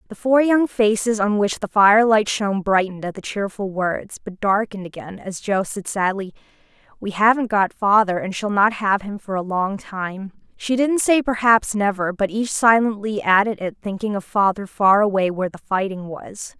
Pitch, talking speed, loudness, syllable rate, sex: 205 Hz, 190 wpm, -19 LUFS, 4.9 syllables/s, female